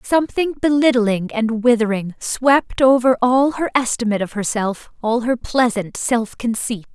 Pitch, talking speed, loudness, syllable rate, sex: 235 Hz, 140 wpm, -18 LUFS, 4.5 syllables/s, female